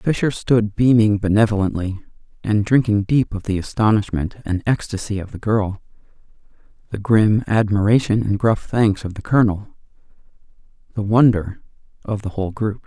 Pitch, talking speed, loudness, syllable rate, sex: 105 Hz, 140 wpm, -19 LUFS, 5.1 syllables/s, male